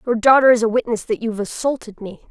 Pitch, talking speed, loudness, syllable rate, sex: 230 Hz, 235 wpm, -17 LUFS, 6.4 syllables/s, female